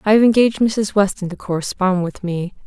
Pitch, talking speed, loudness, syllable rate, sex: 195 Hz, 200 wpm, -18 LUFS, 5.7 syllables/s, female